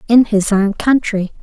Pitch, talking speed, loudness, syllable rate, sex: 215 Hz, 170 wpm, -14 LUFS, 4.3 syllables/s, female